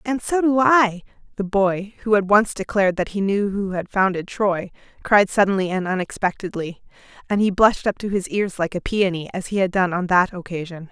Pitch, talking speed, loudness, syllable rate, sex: 195 Hz, 210 wpm, -20 LUFS, 5.4 syllables/s, female